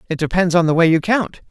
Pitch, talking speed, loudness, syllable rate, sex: 175 Hz, 280 wpm, -16 LUFS, 6.3 syllables/s, female